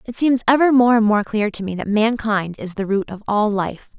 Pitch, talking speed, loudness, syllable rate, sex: 215 Hz, 255 wpm, -18 LUFS, 5.1 syllables/s, female